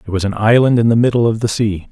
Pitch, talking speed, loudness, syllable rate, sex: 110 Hz, 315 wpm, -14 LUFS, 6.4 syllables/s, male